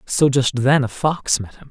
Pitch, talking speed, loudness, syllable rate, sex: 130 Hz, 245 wpm, -18 LUFS, 4.4 syllables/s, male